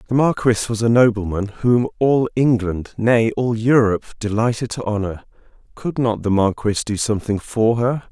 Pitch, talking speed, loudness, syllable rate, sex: 115 Hz, 165 wpm, -19 LUFS, 5.2 syllables/s, male